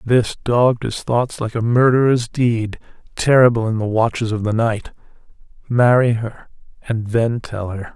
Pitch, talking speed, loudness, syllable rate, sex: 115 Hz, 160 wpm, -18 LUFS, 4.4 syllables/s, male